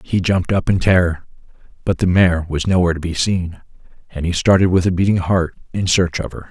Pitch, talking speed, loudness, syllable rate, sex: 90 Hz, 220 wpm, -17 LUFS, 5.8 syllables/s, male